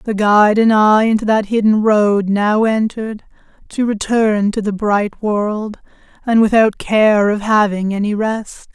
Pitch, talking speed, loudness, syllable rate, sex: 210 Hz, 160 wpm, -14 LUFS, 4.1 syllables/s, female